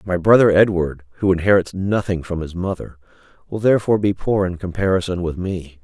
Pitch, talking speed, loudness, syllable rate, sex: 90 Hz, 175 wpm, -19 LUFS, 5.8 syllables/s, male